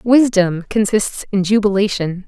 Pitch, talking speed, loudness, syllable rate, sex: 200 Hz, 105 wpm, -16 LUFS, 4.2 syllables/s, female